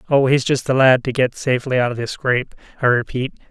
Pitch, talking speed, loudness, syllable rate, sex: 130 Hz, 240 wpm, -18 LUFS, 6.2 syllables/s, male